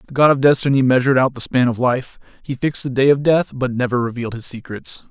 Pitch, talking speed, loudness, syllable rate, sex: 130 Hz, 245 wpm, -17 LUFS, 6.4 syllables/s, male